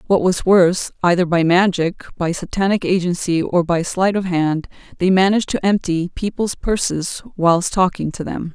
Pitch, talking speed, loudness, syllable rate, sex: 180 Hz, 170 wpm, -18 LUFS, 4.8 syllables/s, female